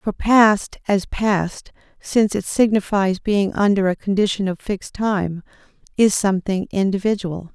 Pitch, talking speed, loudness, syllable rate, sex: 200 Hz, 135 wpm, -19 LUFS, 4.4 syllables/s, female